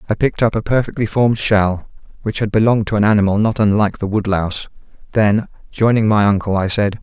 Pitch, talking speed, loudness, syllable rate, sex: 105 Hz, 195 wpm, -16 LUFS, 6.4 syllables/s, male